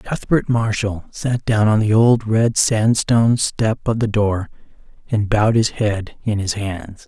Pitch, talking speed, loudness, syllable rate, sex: 110 Hz, 170 wpm, -18 LUFS, 3.9 syllables/s, male